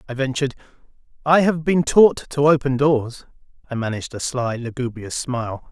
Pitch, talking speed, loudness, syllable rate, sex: 135 Hz, 155 wpm, -20 LUFS, 5.3 syllables/s, male